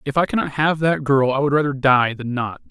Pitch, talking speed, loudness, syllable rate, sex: 140 Hz, 265 wpm, -19 LUFS, 5.6 syllables/s, male